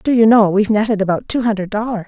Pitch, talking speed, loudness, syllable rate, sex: 210 Hz, 260 wpm, -15 LUFS, 6.9 syllables/s, female